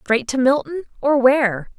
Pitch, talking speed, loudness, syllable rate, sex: 260 Hz, 170 wpm, -18 LUFS, 4.6 syllables/s, female